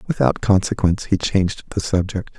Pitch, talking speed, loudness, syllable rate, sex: 100 Hz, 150 wpm, -20 LUFS, 5.6 syllables/s, male